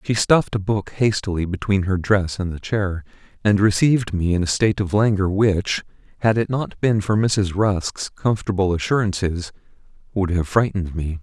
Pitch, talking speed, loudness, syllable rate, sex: 100 Hz, 175 wpm, -20 LUFS, 5.1 syllables/s, male